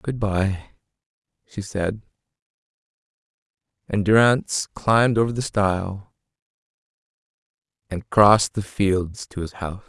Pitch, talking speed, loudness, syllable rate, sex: 100 Hz, 105 wpm, -21 LUFS, 4.5 syllables/s, male